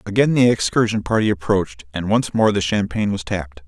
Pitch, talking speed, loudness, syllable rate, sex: 100 Hz, 195 wpm, -19 LUFS, 6.0 syllables/s, male